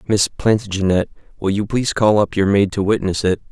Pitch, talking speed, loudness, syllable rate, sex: 100 Hz, 205 wpm, -18 LUFS, 5.8 syllables/s, male